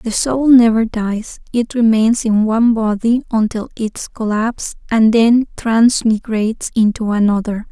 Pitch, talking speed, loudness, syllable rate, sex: 225 Hz, 130 wpm, -15 LUFS, 4.2 syllables/s, female